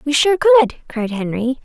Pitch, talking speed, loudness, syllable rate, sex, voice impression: 260 Hz, 185 wpm, -16 LUFS, 5.2 syllables/s, female, feminine, young, cute, friendly, lively